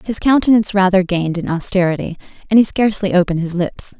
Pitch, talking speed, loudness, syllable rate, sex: 190 Hz, 180 wpm, -16 LUFS, 6.8 syllables/s, female